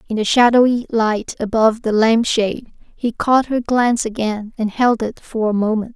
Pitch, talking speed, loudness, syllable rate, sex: 225 Hz, 180 wpm, -17 LUFS, 5.0 syllables/s, female